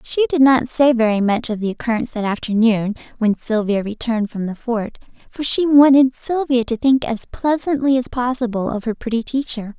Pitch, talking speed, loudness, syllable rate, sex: 240 Hz, 190 wpm, -18 LUFS, 5.3 syllables/s, female